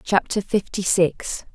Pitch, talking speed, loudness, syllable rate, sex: 185 Hz, 115 wpm, -22 LUFS, 3.6 syllables/s, female